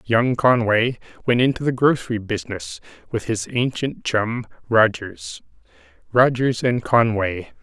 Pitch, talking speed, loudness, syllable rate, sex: 115 Hz, 110 wpm, -20 LUFS, 4.2 syllables/s, male